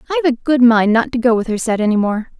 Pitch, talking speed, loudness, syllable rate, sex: 240 Hz, 300 wpm, -15 LUFS, 6.8 syllables/s, female